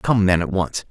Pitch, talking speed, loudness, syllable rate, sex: 95 Hz, 265 wpm, -19 LUFS, 4.8 syllables/s, male